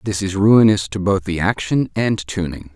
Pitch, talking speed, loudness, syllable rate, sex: 100 Hz, 195 wpm, -17 LUFS, 4.6 syllables/s, male